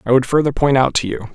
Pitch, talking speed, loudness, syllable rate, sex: 130 Hz, 310 wpm, -16 LUFS, 6.6 syllables/s, male